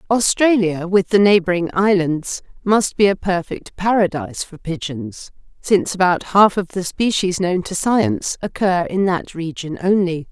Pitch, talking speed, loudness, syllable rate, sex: 180 Hz, 150 wpm, -18 LUFS, 4.5 syllables/s, female